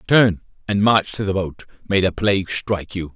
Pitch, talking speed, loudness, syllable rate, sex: 95 Hz, 210 wpm, -20 LUFS, 5.2 syllables/s, male